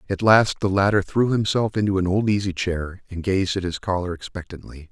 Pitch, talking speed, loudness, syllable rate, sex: 95 Hz, 210 wpm, -21 LUFS, 5.5 syllables/s, male